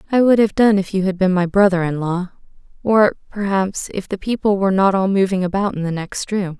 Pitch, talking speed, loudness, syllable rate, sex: 190 Hz, 230 wpm, -18 LUFS, 5.7 syllables/s, female